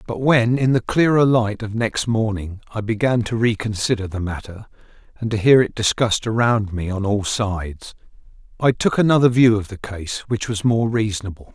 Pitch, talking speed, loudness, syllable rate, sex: 110 Hz, 185 wpm, -19 LUFS, 5.1 syllables/s, male